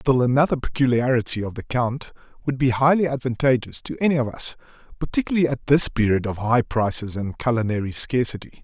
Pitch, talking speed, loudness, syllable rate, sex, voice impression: 125 Hz, 165 wpm, -22 LUFS, 6.0 syllables/s, male, masculine, adult-like, slightly thick, slightly fluent, cool, slightly intellectual, sincere